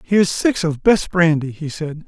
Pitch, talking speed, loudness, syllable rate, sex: 165 Hz, 205 wpm, -18 LUFS, 4.6 syllables/s, male